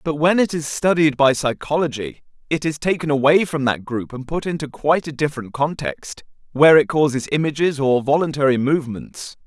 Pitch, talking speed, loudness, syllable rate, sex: 145 Hz, 180 wpm, -19 LUFS, 5.5 syllables/s, male